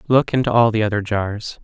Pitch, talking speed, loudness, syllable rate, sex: 110 Hz, 220 wpm, -18 LUFS, 5.4 syllables/s, male